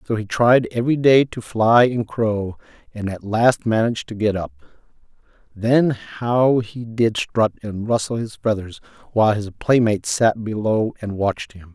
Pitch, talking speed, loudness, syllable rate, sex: 110 Hz, 170 wpm, -19 LUFS, 4.5 syllables/s, male